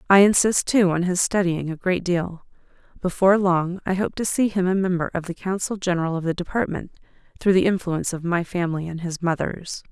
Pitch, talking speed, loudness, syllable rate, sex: 180 Hz, 205 wpm, -22 LUFS, 5.7 syllables/s, female